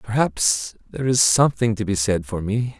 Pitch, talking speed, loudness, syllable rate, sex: 105 Hz, 195 wpm, -20 LUFS, 5.0 syllables/s, male